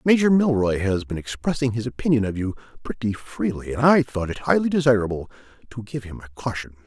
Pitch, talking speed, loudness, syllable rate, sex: 120 Hz, 190 wpm, -22 LUFS, 6.0 syllables/s, male